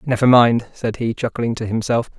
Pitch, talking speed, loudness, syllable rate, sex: 115 Hz, 190 wpm, -18 LUFS, 5.1 syllables/s, male